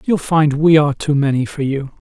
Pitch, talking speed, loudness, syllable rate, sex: 145 Hz, 230 wpm, -16 LUFS, 5.4 syllables/s, male